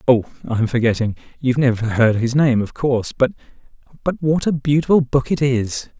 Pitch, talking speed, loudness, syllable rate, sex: 130 Hz, 180 wpm, -18 LUFS, 5.8 syllables/s, male